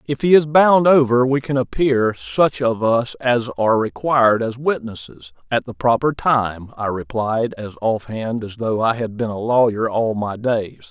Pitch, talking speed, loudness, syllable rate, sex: 120 Hz, 195 wpm, -18 LUFS, 4.4 syllables/s, male